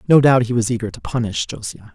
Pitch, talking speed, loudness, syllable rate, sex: 120 Hz, 245 wpm, -18 LUFS, 6.7 syllables/s, male